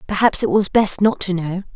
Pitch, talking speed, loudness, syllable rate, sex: 190 Hz, 240 wpm, -17 LUFS, 5.3 syllables/s, female